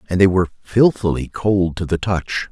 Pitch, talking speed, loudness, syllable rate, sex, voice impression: 95 Hz, 190 wpm, -18 LUFS, 5.0 syllables/s, male, very masculine, middle-aged, very thick, tensed, very powerful, slightly dark, soft, very muffled, fluent, raspy, very cool, intellectual, slightly refreshing, sincere, very calm, very mature, very friendly, very reassuring, very unique, slightly elegant, very wild, sweet, lively, very kind, slightly modest